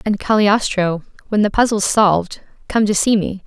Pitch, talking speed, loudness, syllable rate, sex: 205 Hz, 175 wpm, -16 LUFS, 4.9 syllables/s, female